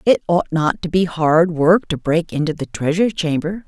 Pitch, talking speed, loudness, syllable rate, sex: 165 Hz, 210 wpm, -18 LUFS, 4.9 syllables/s, female